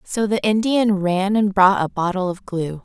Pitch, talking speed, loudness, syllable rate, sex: 195 Hz, 210 wpm, -19 LUFS, 4.4 syllables/s, female